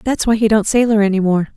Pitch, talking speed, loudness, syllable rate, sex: 210 Hz, 270 wpm, -14 LUFS, 6.5 syllables/s, female